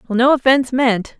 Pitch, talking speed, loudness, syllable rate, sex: 250 Hz, 200 wpm, -15 LUFS, 5.8 syllables/s, female